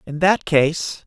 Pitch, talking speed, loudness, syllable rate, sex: 160 Hz, 170 wpm, -18 LUFS, 4.4 syllables/s, male